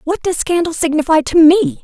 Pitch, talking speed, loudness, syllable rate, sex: 320 Hz, 195 wpm, -13 LUFS, 6.1 syllables/s, female